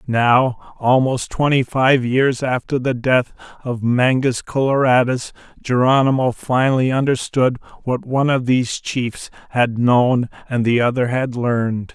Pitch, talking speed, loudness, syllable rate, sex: 125 Hz, 130 wpm, -18 LUFS, 4.2 syllables/s, male